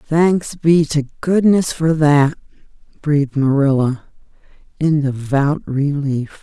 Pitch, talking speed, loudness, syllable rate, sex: 150 Hz, 105 wpm, -16 LUFS, 3.6 syllables/s, female